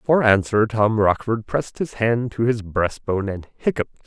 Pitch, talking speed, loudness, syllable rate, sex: 110 Hz, 175 wpm, -21 LUFS, 4.9 syllables/s, male